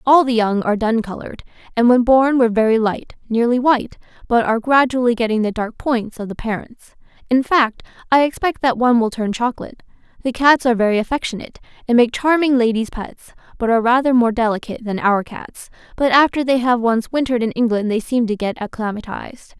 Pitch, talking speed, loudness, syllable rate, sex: 235 Hz, 195 wpm, -17 LUFS, 6.1 syllables/s, female